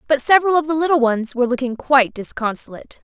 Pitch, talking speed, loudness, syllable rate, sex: 270 Hz, 195 wpm, -17 LUFS, 6.9 syllables/s, female